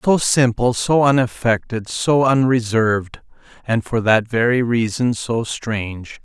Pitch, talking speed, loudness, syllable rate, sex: 120 Hz, 125 wpm, -18 LUFS, 4.0 syllables/s, male